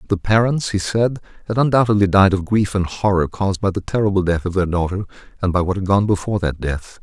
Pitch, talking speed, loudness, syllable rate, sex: 100 Hz, 230 wpm, -18 LUFS, 6.2 syllables/s, male